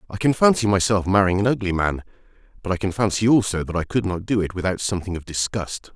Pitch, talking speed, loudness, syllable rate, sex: 95 Hz, 230 wpm, -21 LUFS, 6.4 syllables/s, male